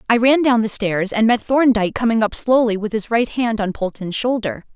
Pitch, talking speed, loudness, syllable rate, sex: 225 Hz, 225 wpm, -18 LUFS, 5.3 syllables/s, female